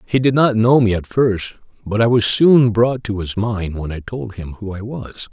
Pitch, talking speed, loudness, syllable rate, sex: 110 Hz, 250 wpm, -17 LUFS, 4.5 syllables/s, male